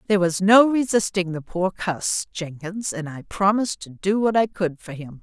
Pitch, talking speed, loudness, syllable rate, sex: 190 Hz, 205 wpm, -22 LUFS, 4.8 syllables/s, female